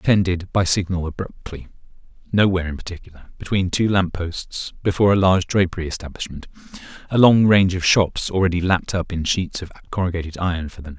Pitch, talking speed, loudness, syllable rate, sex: 90 Hz, 175 wpm, -20 LUFS, 6.3 syllables/s, male